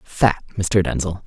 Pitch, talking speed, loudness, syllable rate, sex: 95 Hz, 140 wpm, -20 LUFS, 3.9 syllables/s, male